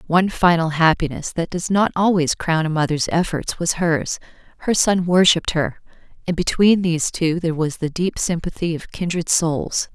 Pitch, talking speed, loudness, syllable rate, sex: 170 Hz, 170 wpm, -19 LUFS, 5.0 syllables/s, female